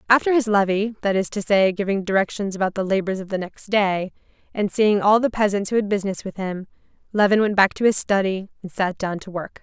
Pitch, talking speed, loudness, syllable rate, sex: 200 Hz, 230 wpm, -21 LUFS, 5.9 syllables/s, female